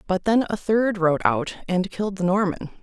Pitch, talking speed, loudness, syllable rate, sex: 190 Hz, 210 wpm, -22 LUFS, 5.0 syllables/s, female